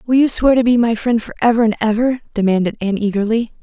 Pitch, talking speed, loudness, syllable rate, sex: 230 Hz, 215 wpm, -16 LUFS, 6.5 syllables/s, female